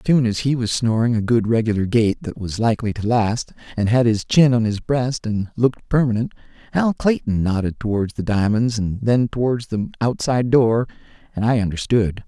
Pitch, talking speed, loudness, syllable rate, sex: 115 Hz, 195 wpm, -19 LUFS, 5.3 syllables/s, male